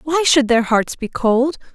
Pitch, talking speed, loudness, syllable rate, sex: 265 Hz, 205 wpm, -16 LUFS, 4.1 syllables/s, female